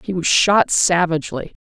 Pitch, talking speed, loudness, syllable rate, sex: 175 Hz, 150 wpm, -16 LUFS, 4.8 syllables/s, female